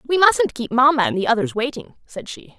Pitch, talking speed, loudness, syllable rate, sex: 250 Hz, 230 wpm, -18 LUFS, 5.6 syllables/s, female